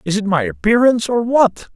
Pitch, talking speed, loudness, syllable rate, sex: 205 Hz, 205 wpm, -15 LUFS, 5.6 syllables/s, male